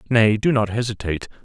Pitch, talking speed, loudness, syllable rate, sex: 110 Hz, 165 wpm, -20 LUFS, 6.5 syllables/s, male